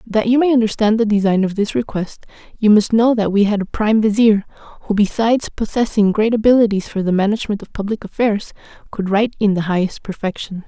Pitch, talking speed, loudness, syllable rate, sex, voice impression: 210 Hz, 195 wpm, -17 LUFS, 5.9 syllables/s, female, feminine, adult-like, relaxed, powerful, slightly bright, soft, slightly muffled, slightly raspy, intellectual, calm, friendly, reassuring, kind, modest